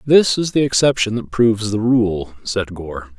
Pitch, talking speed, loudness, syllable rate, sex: 110 Hz, 190 wpm, -17 LUFS, 4.5 syllables/s, male